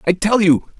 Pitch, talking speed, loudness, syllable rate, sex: 195 Hz, 230 wpm, -15 LUFS, 5.2 syllables/s, male